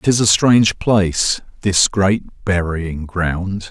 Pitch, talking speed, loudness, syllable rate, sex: 95 Hz, 145 wpm, -16 LUFS, 3.5 syllables/s, male